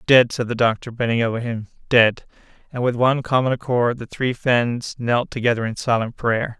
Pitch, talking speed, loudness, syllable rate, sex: 120 Hz, 190 wpm, -20 LUFS, 5.2 syllables/s, male